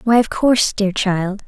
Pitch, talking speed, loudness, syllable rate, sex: 210 Hz, 205 wpm, -17 LUFS, 4.4 syllables/s, female